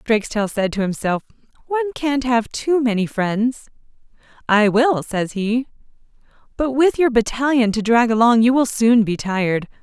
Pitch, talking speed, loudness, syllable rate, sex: 235 Hz, 160 wpm, -18 LUFS, 4.8 syllables/s, female